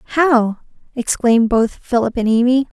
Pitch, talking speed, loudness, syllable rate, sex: 240 Hz, 130 wpm, -16 LUFS, 5.1 syllables/s, female